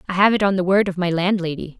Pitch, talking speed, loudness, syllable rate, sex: 185 Hz, 300 wpm, -19 LUFS, 6.8 syllables/s, female